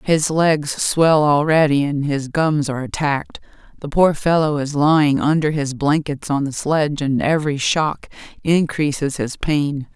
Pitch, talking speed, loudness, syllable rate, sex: 150 Hz, 155 wpm, -18 LUFS, 4.4 syllables/s, female